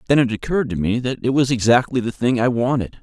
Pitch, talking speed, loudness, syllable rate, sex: 120 Hz, 260 wpm, -19 LUFS, 6.4 syllables/s, male